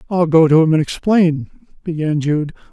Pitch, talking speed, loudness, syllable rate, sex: 160 Hz, 175 wpm, -15 LUFS, 5.0 syllables/s, male